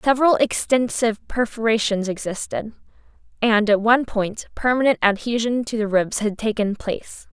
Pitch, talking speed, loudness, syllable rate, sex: 225 Hz, 130 wpm, -21 LUFS, 5.1 syllables/s, female